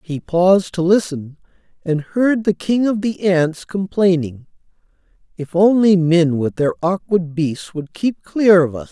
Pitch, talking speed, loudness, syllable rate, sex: 180 Hz, 160 wpm, -17 LUFS, 4.1 syllables/s, male